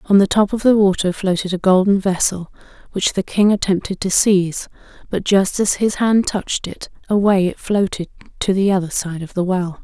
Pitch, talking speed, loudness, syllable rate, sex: 190 Hz, 200 wpm, -17 LUFS, 5.3 syllables/s, female